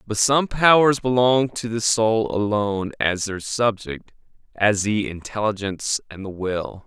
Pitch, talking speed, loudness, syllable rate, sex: 110 Hz, 150 wpm, -21 LUFS, 4.2 syllables/s, male